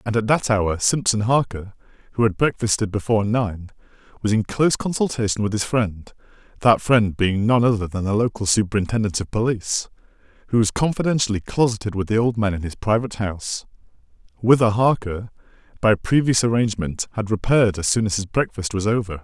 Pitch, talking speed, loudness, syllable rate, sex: 110 Hz, 170 wpm, -20 LUFS, 5.8 syllables/s, male